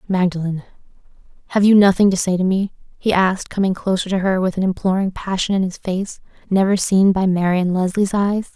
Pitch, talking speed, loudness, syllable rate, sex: 190 Hz, 190 wpm, -18 LUFS, 5.6 syllables/s, female